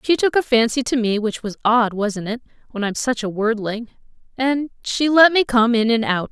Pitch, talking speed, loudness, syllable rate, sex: 235 Hz, 210 wpm, -19 LUFS, 5.0 syllables/s, female